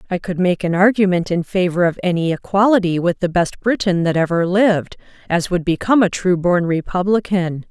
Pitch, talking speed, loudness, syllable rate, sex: 180 Hz, 180 wpm, -17 LUFS, 5.5 syllables/s, female